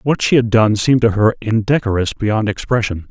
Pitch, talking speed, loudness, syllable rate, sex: 110 Hz, 195 wpm, -15 LUFS, 5.4 syllables/s, male